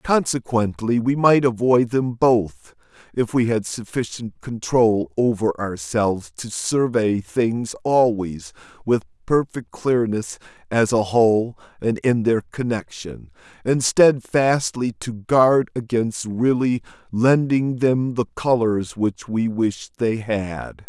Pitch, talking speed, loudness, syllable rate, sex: 115 Hz, 120 wpm, -20 LUFS, 3.6 syllables/s, male